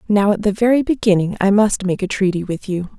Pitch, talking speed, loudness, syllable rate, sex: 200 Hz, 240 wpm, -17 LUFS, 5.7 syllables/s, female